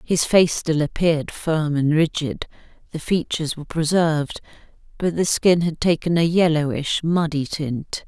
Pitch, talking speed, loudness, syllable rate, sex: 160 Hz, 150 wpm, -20 LUFS, 4.6 syllables/s, female